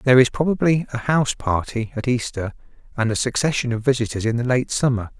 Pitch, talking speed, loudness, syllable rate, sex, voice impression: 125 Hz, 195 wpm, -21 LUFS, 6.2 syllables/s, male, masculine, adult-like, slightly fluent, refreshing, slightly sincere, friendly, slightly kind